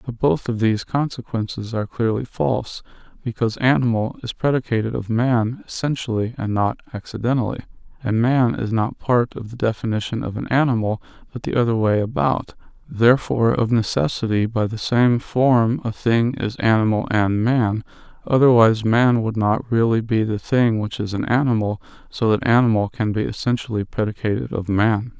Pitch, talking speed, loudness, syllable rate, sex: 115 Hz, 160 wpm, -20 LUFS, 5.2 syllables/s, male